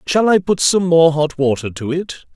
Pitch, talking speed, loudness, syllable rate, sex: 160 Hz, 230 wpm, -15 LUFS, 4.9 syllables/s, male